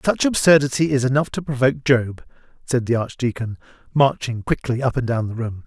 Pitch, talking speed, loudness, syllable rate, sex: 130 Hz, 180 wpm, -20 LUFS, 5.6 syllables/s, male